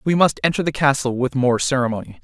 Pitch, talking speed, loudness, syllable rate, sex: 135 Hz, 215 wpm, -19 LUFS, 6.3 syllables/s, male